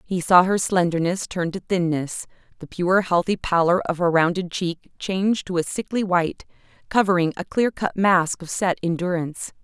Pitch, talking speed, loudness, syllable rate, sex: 180 Hz, 175 wpm, -22 LUFS, 5.0 syllables/s, female